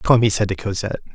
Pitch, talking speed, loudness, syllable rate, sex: 105 Hz, 260 wpm, -20 LUFS, 7.1 syllables/s, male